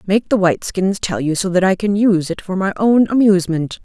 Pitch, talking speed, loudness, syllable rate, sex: 190 Hz, 235 wpm, -16 LUFS, 5.8 syllables/s, female